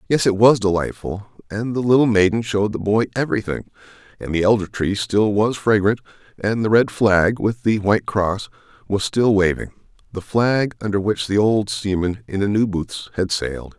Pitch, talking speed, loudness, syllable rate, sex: 105 Hz, 185 wpm, -19 LUFS, 5.1 syllables/s, male